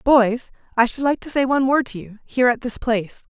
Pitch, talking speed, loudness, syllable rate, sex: 245 Hz, 250 wpm, -20 LUFS, 6.1 syllables/s, female